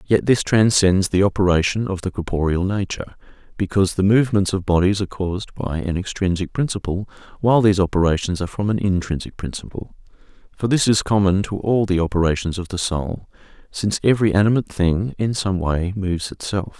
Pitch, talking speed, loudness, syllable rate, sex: 95 Hz, 170 wpm, -20 LUFS, 6.0 syllables/s, male